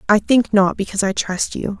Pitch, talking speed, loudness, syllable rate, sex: 205 Hz, 235 wpm, -18 LUFS, 5.6 syllables/s, female